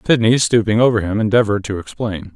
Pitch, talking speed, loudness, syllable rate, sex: 110 Hz, 180 wpm, -16 LUFS, 6.2 syllables/s, male